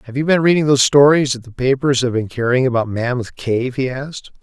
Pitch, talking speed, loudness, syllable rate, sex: 130 Hz, 230 wpm, -16 LUFS, 6.0 syllables/s, male